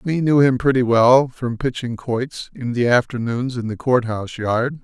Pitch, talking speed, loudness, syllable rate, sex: 125 Hz, 200 wpm, -19 LUFS, 4.5 syllables/s, male